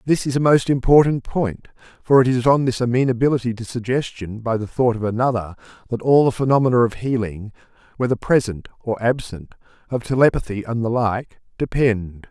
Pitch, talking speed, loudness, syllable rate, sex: 120 Hz, 170 wpm, -19 LUFS, 5.5 syllables/s, male